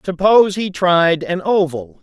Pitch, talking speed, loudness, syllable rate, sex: 180 Hz, 150 wpm, -15 LUFS, 4.2 syllables/s, male